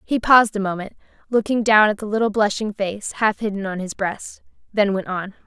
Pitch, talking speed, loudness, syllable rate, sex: 205 Hz, 210 wpm, -20 LUFS, 5.5 syllables/s, female